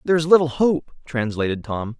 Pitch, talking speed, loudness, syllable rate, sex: 140 Hz, 180 wpm, -20 LUFS, 5.7 syllables/s, male